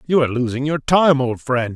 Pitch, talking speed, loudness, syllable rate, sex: 135 Hz, 240 wpm, -18 LUFS, 5.4 syllables/s, male